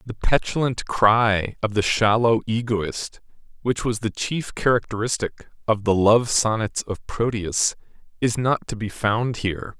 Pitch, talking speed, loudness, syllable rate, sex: 110 Hz, 145 wpm, -22 LUFS, 4.1 syllables/s, male